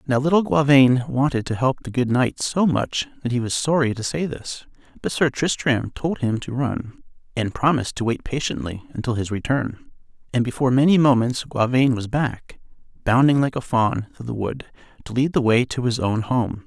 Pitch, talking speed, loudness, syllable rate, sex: 125 Hz, 200 wpm, -21 LUFS, 5.1 syllables/s, male